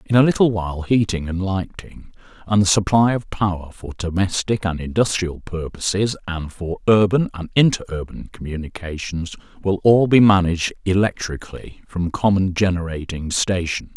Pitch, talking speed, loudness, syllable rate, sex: 95 Hz, 140 wpm, -20 LUFS, 5.0 syllables/s, male